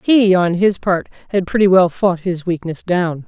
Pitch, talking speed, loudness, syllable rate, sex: 180 Hz, 200 wpm, -16 LUFS, 4.4 syllables/s, female